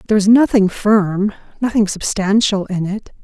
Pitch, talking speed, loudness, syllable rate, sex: 205 Hz, 150 wpm, -16 LUFS, 4.8 syllables/s, female